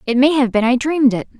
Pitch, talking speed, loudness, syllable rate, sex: 255 Hz, 300 wpm, -15 LUFS, 6.8 syllables/s, female